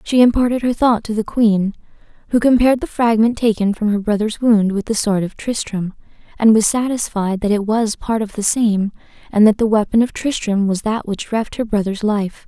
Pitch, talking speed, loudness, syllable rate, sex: 215 Hz, 210 wpm, -17 LUFS, 5.2 syllables/s, female